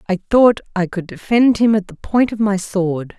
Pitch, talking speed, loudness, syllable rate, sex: 200 Hz, 225 wpm, -16 LUFS, 4.5 syllables/s, female